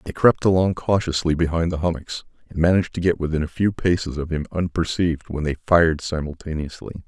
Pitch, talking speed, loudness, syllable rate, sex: 80 Hz, 185 wpm, -21 LUFS, 6.1 syllables/s, male